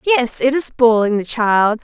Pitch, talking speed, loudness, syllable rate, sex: 240 Hz, 195 wpm, -15 LUFS, 4.1 syllables/s, female